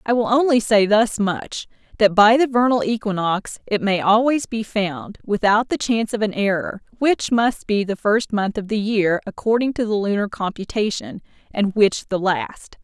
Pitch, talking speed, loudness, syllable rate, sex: 215 Hz, 185 wpm, -19 LUFS, 4.6 syllables/s, female